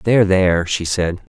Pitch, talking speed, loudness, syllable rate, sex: 95 Hz, 180 wpm, -17 LUFS, 4.9 syllables/s, male